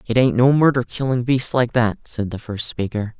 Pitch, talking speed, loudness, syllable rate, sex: 120 Hz, 225 wpm, -19 LUFS, 5.0 syllables/s, male